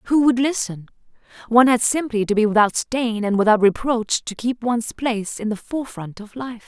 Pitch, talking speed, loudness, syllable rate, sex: 230 Hz, 200 wpm, -20 LUFS, 5.3 syllables/s, female